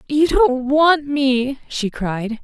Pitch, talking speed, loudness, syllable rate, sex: 270 Hz, 150 wpm, -17 LUFS, 2.8 syllables/s, female